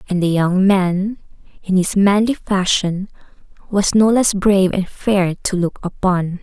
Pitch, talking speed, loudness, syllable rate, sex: 190 Hz, 160 wpm, -17 LUFS, 4.0 syllables/s, female